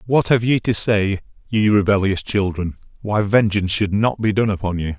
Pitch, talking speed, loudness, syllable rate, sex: 100 Hz, 190 wpm, -19 LUFS, 5.1 syllables/s, male